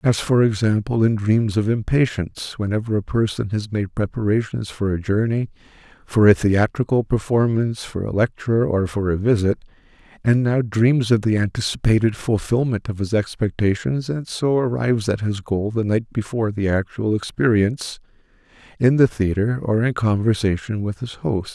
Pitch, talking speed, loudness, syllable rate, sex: 110 Hz, 160 wpm, -20 LUFS, 5.1 syllables/s, male